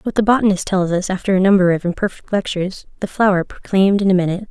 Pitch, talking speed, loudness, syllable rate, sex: 190 Hz, 225 wpm, -17 LUFS, 7.0 syllables/s, female